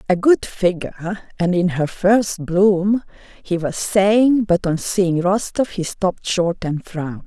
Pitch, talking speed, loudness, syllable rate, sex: 190 Hz, 165 wpm, -18 LUFS, 3.8 syllables/s, female